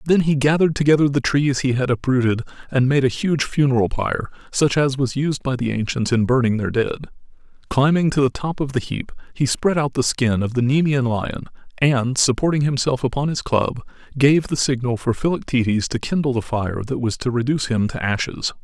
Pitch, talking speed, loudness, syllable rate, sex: 130 Hz, 205 wpm, -20 LUFS, 5.5 syllables/s, male